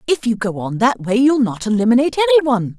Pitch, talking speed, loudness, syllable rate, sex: 230 Hz, 215 wpm, -16 LUFS, 7.2 syllables/s, female